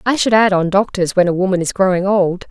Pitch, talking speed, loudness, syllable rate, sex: 190 Hz, 265 wpm, -15 LUFS, 5.9 syllables/s, female